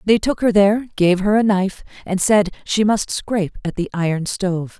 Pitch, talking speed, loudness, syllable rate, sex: 195 Hz, 215 wpm, -18 LUFS, 5.3 syllables/s, female